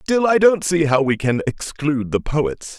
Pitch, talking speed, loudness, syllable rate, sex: 150 Hz, 215 wpm, -18 LUFS, 4.5 syllables/s, male